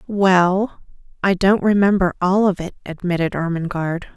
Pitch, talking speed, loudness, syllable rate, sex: 185 Hz, 130 wpm, -18 LUFS, 4.7 syllables/s, female